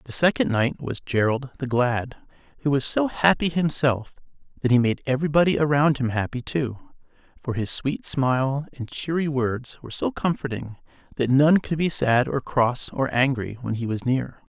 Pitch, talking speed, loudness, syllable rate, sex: 135 Hz, 175 wpm, -23 LUFS, 4.8 syllables/s, male